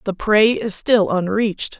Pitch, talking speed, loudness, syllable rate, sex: 210 Hz, 165 wpm, -17 LUFS, 4.2 syllables/s, female